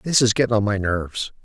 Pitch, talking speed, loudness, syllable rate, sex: 110 Hz, 250 wpm, -20 LUFS, 6.4 syllables/s, male